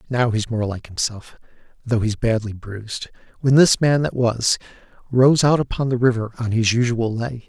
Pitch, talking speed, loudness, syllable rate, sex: 120 Hz, 175 wpm, -20 LUFS, 4.9 syllables/s, male